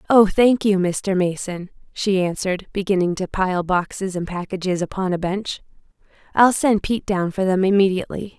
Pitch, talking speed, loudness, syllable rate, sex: 190 Hz, 165 wpm, -20 LUFS, 5.1 syllables/s, female